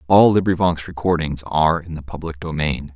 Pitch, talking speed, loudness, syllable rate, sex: 80 Hz, 165 wpm, -19 LUFS, 5.6 syllables/s, male